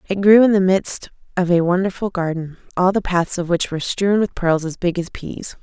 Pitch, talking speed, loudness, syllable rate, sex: 180 Hz, 235 wpm, -18 LUFS, 5.2 syllables/s, female